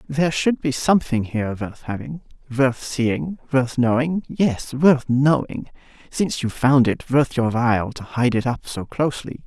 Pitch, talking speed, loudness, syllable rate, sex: 130 Hz, 160 wpm, -21 LUFS, 4.6 syllables/s, male